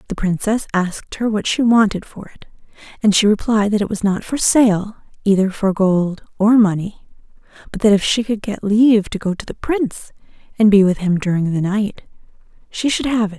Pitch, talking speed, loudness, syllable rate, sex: 205 Hz, 205 wpm, -17 LUFS, 5.2 syllables/s, female